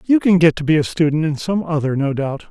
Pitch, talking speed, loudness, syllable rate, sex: 160 Hz, 290 wpm, -17 LUFS, 5.9 syllables/s, male